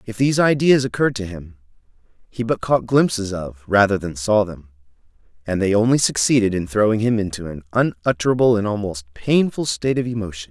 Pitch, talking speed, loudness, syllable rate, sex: 105 Hz, 175 wpm, -19 LUFS, 5.8 syllables/s, male